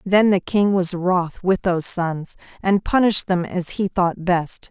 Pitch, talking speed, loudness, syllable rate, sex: 185 Hz, 190 wpm, -19 LUFS, 4.1 syllables/s, female